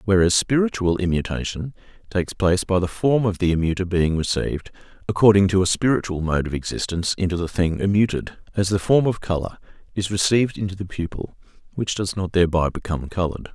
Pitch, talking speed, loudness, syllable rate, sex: 95 Hz, 175 wpm, -21 LUFS, 6.2 syllables/s, male